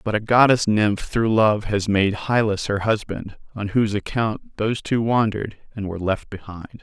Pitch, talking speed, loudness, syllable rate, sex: 110 Hz, 185 wpm, -21 LUFS, 5.1 syllables/s, male